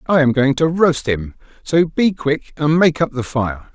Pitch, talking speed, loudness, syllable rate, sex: 145 Hz, 225 wpm, -17 LUFS, 4.3 syllables/s, male